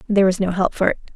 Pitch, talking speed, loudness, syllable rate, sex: 190 Hz, 310 wpm, -19 LUFS, 8.2 syllables/s, female